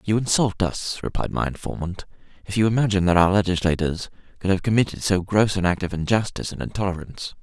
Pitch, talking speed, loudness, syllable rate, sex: 95 Hz, 185 wpm, -22 LUFS, 6.4 syllables/s, male